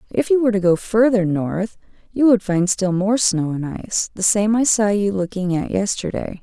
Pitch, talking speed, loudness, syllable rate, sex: 200 Hz, 215 wpm, -19 LUFS, 5.0 syllables/s, female